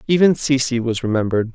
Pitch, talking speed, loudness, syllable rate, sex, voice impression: 125 Hz, 155 wpm, -18 LUFS, 6.5 syllables/s, male, very masculine, very adult-like, slightly thick, tensed, slightly powerful, bright, soft, slightly clear, fluent, slightly cool, intellectual, refreshing, sincere, very calm, slightly mature, friendly, reassuring, slightly unique, elegant, slightly wild, sweet, lively, kind, slightly modest